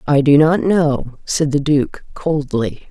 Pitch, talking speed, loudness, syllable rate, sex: 145 Hz, 165 wpm, -16 LUFS, 3.5 syllables/s, female